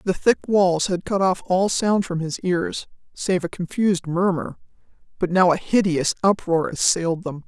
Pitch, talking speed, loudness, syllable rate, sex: 180 Hz, 175 wpm, -21 LUFS, 4.6 syllables/s, female